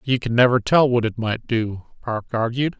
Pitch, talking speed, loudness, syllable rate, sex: 120 Hz, 215 wpm, -20 LUFS, 4.9 syllables/s, male